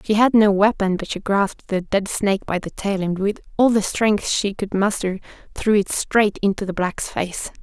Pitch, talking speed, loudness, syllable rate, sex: 200 Hz, 220 wpm, -20 LUFS, 4.8 syllables/s, female